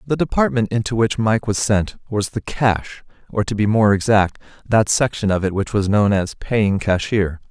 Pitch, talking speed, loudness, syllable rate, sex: 105 Hz, 200 wpm, -19 LUFS, 4.7 syllables/s, male